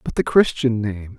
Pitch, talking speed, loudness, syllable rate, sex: 115 Hz, 200 wpm, -19 LUFS, 4.6 syllables/s, male